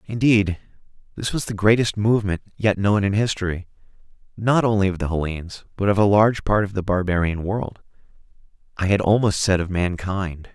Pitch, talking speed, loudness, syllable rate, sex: 100 Hz, 165 wpm, -21 LUFS, 5.5 syllables/s, male